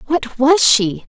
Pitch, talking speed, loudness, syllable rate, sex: 265 Hz, 155 wpm, -14 LUFS, 3.4 syllables/s, female